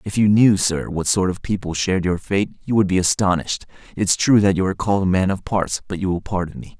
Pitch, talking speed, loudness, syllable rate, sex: 95 Hz, 265 wpm, -19 LUFS, 6.0 syllables/s, male